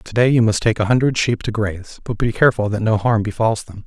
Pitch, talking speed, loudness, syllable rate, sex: 110 Hz, 280 wpm, -18 LUFS, 6.1 syllables/s, male